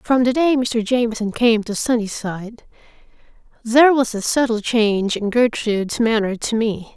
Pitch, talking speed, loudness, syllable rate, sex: 230 Hz, 155 wpm, -18 LUFS, 4.9 syllables/s, female